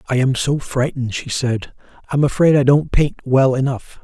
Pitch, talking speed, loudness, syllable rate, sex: 135 Hz, 180 wpm, -17 LUFS, 4.6 syllables/s, male